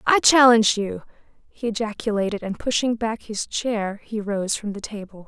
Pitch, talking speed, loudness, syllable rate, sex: 215 Hz, 170 wpm, -22 LUFS, 4.9 syllables/s, female